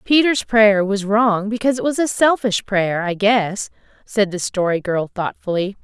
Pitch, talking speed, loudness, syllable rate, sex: 210 Hz, 175 wpm, -18 LUFS, 4.5 syllables/s, female